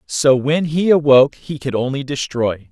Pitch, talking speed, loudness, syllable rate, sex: 140 Hz, 175 wpm, -16 LUFS, 4.7 syllables/s, male